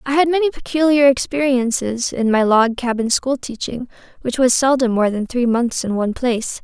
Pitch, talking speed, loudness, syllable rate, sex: 250 Hz, 190 wpm, -17 LUFS, 5.2 syllables/s, female